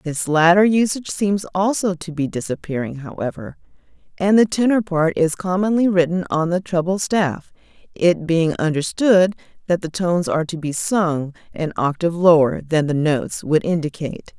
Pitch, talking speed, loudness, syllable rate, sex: 170 Hz, 160 wpm, -19 LUFS, 5.0 syllables/s, female